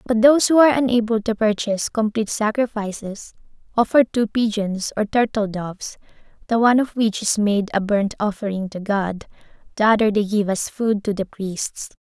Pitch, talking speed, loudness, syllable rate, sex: 215 Hz, 175 wpm, -20 LUFS, 5.3 syllables/s, female